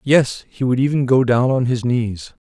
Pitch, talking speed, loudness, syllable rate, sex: 125 Hz, 220 wpm, -18 LUFS, 4.5 syllables/s, male